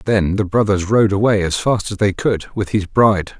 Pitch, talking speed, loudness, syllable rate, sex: 100 Hz, 230 wpm, -17 LUFS, 5.1 syllables/s, male